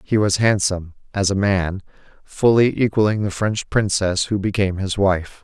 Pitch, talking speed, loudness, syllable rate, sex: 100 Hz, 165 wpm, -19 LUFS, 4.9 syllables/s, male